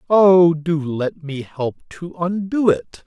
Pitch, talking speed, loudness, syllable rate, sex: 160 Hz, 155 wpm, -18 LUFS, 3.3 syllables/s, male